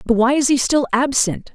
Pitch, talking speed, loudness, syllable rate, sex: 260 Hz, 235 wpm, -17 LUFS, 5.1 syllables/s, female